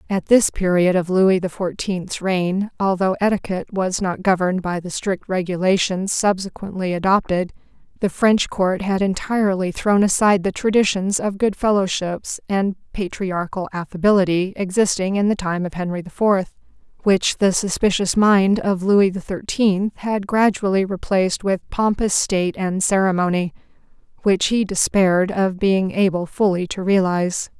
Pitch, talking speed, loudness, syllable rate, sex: 190 Hz, 145 wpm, -19 LUFS, 4.7 syllables/s, female